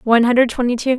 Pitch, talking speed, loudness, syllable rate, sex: 245 Hz, 245 wpm, -16 LUFS, 7.9 syllables/s, female